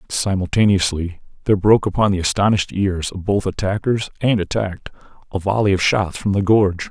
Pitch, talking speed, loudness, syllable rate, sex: 95 Hz, 165 wpm, -18 LUFS, 5.9 syllables/s, male